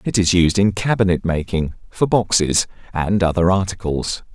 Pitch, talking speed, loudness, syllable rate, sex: 90 Hz, 150 wpm, -18 LUFS, 4.8 syllables/s, male